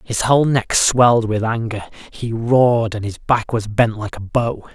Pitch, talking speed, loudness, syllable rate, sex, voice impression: 115 Hz, 200 wpm, -17 LUFS, 4.6 syllables/s, male, masculine, middle-aged, slightly relaxed, powerful, muffled, raspy, calm, slightly mature, slightly friendly, wild, lively